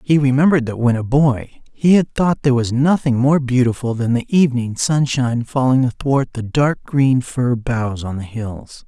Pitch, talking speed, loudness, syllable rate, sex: 130 Hz, 190 wpm, -17 LUFS, 4.8 syllables/s, male